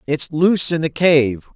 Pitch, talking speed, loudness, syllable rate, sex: 155 Hz, 195 wpm, -16 LUFS, 4.6 syllables/s, male